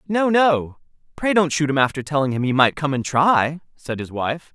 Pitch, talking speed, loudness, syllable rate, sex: 150 Hz, 225 wpm, -20 LUFS, 4.9 syllables/s, male